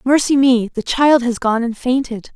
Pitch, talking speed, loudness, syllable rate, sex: 250 Hz, 205 wpm, -16 LUFS, 4.6 syllables/s, female